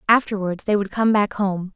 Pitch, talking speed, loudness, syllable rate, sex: 200 Hz, 205 wpm, -21 LUFS, 5.0 syllables/s, female